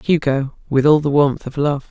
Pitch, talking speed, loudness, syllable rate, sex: 140 Hz, 220 wpm, -17 LUFS, 2.9 syllables/s, female